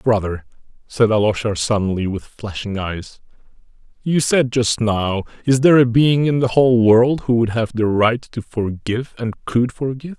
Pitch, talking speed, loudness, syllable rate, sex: 115 Hz, 170 wpm, -18 LUFS, 4.7 syllables/s, male